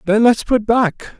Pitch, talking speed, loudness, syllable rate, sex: 220 Hz, 200 wpm, -15 LUFS, 3.9 syllables/s, male